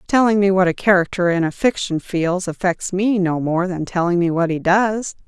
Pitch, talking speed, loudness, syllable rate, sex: 185 Hz, 215 wpm, -18 LUFS, 5.0 syllables/s, female